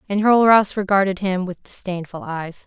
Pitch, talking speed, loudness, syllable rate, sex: 190 Hz, 135 wpm, -19 LUFS, 5.0 syllables/s, female